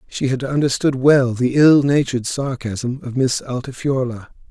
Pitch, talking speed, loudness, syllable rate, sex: 130 Hz, 145 wpm, -18 LUFS, 4.5 syllables/s, male